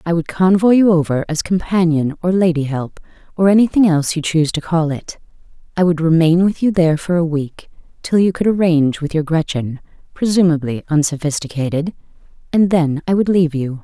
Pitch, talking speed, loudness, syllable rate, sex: 165 Hz, 180 wpm, -16 LUFS, 5.7 syllables/s, female